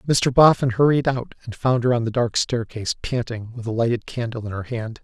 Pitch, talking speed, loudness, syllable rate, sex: 120 Hz, 225 wpm, -21 LUFS, 5.5 syllables/s, male